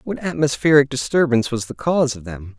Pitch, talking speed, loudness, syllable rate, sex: 135 Hz, 185 wpm, -18 LUFS, 6.1 syllables/s, male